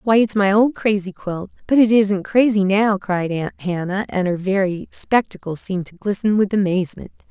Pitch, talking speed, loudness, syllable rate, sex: 200 Hz, 190 wpm, -19 LUFS, 5.0 syllables/s, female